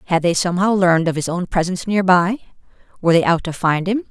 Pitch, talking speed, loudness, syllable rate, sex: 180 Hz, 220 wpm, -17 LUFS, 6.8 syllables/s, female